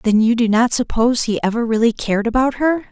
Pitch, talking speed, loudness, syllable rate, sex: 235 Hz, 225 wpm, -17 LUFS, 6.2 syllables/s, female